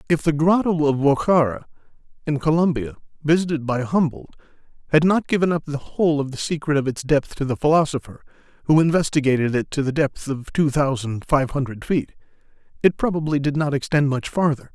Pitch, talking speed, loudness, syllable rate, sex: 150 Hz, 180 wpm, -21 LUFS, 5.7 syllables/s, male